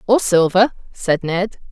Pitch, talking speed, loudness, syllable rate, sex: 195 Hz, 140 wpm, -17 LUFS, 3.8 syllables/s, female